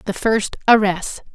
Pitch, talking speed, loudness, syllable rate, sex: 210 Hz, 135 wpm, -17 LUFS, 4.0 syllables/s, female